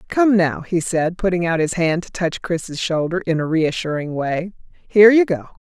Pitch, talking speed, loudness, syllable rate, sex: 175 Hz, 205 wpm, -18 LUFS, 4.8 syllables/s, female